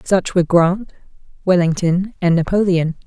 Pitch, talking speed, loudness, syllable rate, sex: 180 Hz, 115 wpm, -17 LUFS, 4.8 syllables/s, female